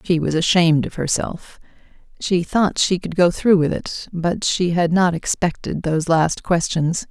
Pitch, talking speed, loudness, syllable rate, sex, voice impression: 170 Hz, 175 wpm, -19 LUFS, 4.4 syllables/s, female, feminine, slightly gender-neutral, adult-like, slightly middle-aged, slightly thin, slightly tensed, slightly weak, bright, slightly hard, clear, fluent, cool, intellectual, slightly refreshing, sincere, calm, friendly, reassuring, elegant, sweet, slightly lively, kind, slightly modest